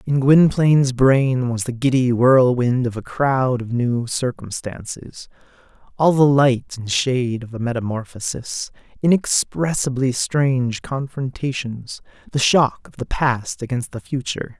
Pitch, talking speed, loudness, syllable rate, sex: 130 Hz, 130 wpm, -19 LUFS, 4.2 syllables/s, male